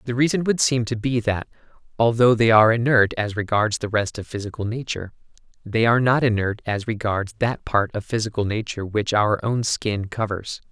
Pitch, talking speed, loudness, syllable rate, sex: 110 Hz, 190 wpm, -21 LUFS, 5.4 syllables/s, male